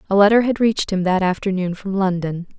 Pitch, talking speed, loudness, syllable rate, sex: 195 Hz, 210 wpm, -18 LUFS, 6.1 syllables/s, female